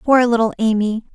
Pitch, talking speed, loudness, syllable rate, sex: 225 Hz, 155 wpm, -17 LUFS, 5.3 syllables/s, female